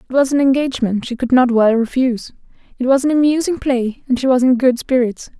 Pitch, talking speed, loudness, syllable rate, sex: 255 Hz, 225 wpm, -16 LUFS, 6.0 syllables/s, female